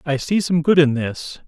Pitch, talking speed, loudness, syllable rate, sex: 155 Hz, 245 wpm, -18 LUFS, 4.6 syllables/s, male